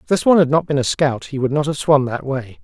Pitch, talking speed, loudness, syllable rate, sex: 140 Hz, 340 wpm, -17 LUFS, 6.3 syllables/s, male